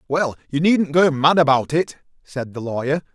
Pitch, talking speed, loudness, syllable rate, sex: 150 Hz, 190 wpm, -19 LUFS, 4.7 syllables/s, male